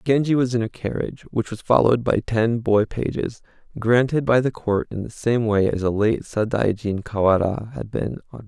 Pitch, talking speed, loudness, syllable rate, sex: 115 Hz, 200 wpm, -21 LUFS, 5.3 syllables/s, male